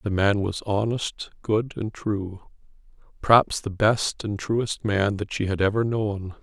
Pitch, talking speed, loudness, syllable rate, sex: 105 Hz, 160 wpm, -24 LUFS, 4.0 syllables/s, male